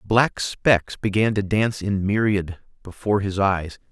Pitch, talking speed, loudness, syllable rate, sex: 100 Hz, 155 wpm, -22 LUFS, 4.4 syllables/s, male